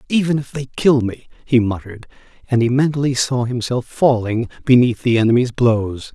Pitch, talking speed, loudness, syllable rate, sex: 120 Hz, 165 wpm, -17 LUFS, 5.3 syllables/s, male